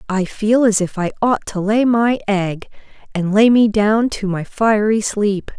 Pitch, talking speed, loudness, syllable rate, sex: 210 Hz, 195 wpm, -16 LUFS, 4.0 syllables/s, female